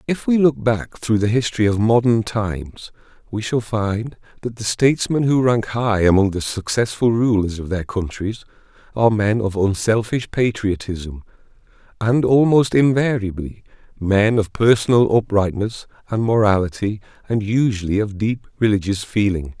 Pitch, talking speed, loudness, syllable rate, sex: 110 Hz, 140 wpm, -19 LUFS, 4.7 syllables/s, male